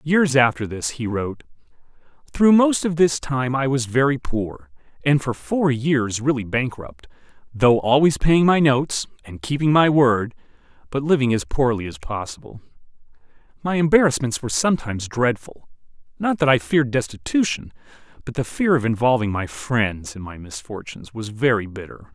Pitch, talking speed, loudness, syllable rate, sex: 125 Hz, 155 wpm, -20 LUFS, 5.0 syllables/s, male